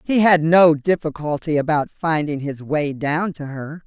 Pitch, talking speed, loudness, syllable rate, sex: 155 Hz, 170 wpm, -19 LUFS, 4.2 syllables/s, female